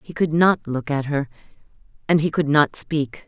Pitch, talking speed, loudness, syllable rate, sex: 150 Hz, 200 wpm, -20 LUFS, 4.7 syllables/s, female